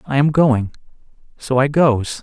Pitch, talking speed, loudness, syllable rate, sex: 135 Hz, 160 wpm, -16 LUFS, 4.0 syllables/s, male